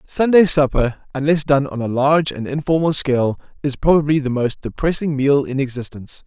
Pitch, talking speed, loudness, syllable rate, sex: 140 Hz, 170 wpm, -18 LUFS, 5.6 syllables/s, male